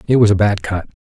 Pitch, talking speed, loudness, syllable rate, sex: 105 Hz, 290 wpm, -15 LUFS, 6.7 syllables/s, male